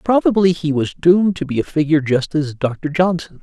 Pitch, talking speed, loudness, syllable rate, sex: 165 Hz, 230 wpm, -17 LUFS, 5.8 syllables/s, male